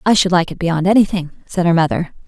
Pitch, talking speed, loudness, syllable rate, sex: 175 Hz, 235 wpm, -16 LUFS, 6.1 syllables/s, female